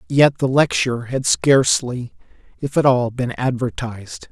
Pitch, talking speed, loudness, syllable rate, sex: 125 Hz, 140 wpm, -18 LUFS, 4.6 syllables/s, male